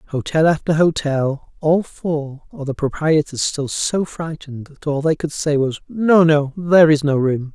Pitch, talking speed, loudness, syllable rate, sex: 150 Hz, 185 wpm, -18 LUFS, 4.3 syllables/s, male